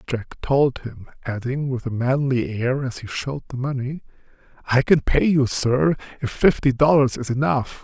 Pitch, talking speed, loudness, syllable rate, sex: 130 Hz, 175 wpm, -21 LUFS, 4.6 syllables/s, male